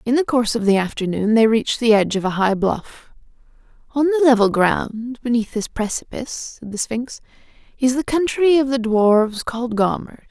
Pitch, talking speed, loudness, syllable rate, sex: 235 Hz, 185 wpm, -19 LUFS, 5.3 syllables/s, female